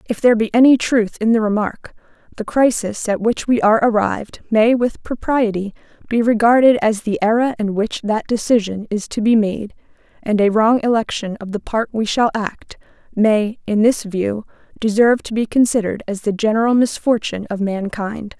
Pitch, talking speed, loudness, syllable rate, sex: 220 Hz, 180 wpm, -17 LUFS, 5.2 syllables/s, female